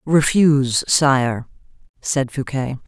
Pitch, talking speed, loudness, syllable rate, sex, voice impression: 135 Hz, 85 wpm, -18 LUFS, 3.3 syllables/s, female, feminine, adult-like, slightly intellectual, slightly calm, elegant, slightly strict